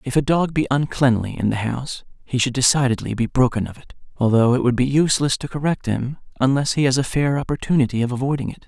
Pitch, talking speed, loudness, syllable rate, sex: 130 Hz, 220 wpm, -20 LUFS, 6.3 syllables/s, male